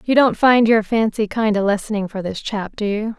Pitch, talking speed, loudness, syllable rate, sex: 215 Hz, 245 wpm, -18 LUFS, 5.2 syllables/s, female